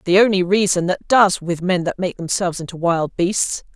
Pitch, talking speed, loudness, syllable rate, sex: 180 Hz, 210 wpm, -18 LUFS, 5.1 syllables/s, female